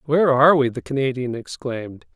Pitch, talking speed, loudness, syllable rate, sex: 135 Hz, 165 wpm, -20 LUFS, 6.1 syllables/s, male